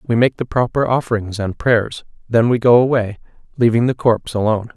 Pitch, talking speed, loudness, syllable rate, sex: 115 Hz, 175 wpm, -17 LUFS, 5.7 syllables/s, male